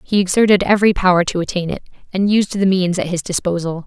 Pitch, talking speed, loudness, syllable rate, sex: 185 Hz, 220 wpm, -16 LUFS, 6.4 syllables/s, female